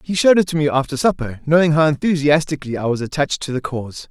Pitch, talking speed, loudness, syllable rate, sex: 150 Hz, 235 wpm, -18 LUFS, 7.2 syllables/s, male